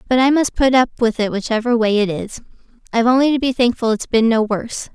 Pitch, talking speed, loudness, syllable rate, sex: 235 Hz, 230 wpm, -17 LUFS, 6.3 syllables/s, female